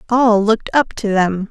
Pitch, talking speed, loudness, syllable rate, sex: 215 Hz, 200 wpm, -15 LUFS, 4.7 syllables/s, female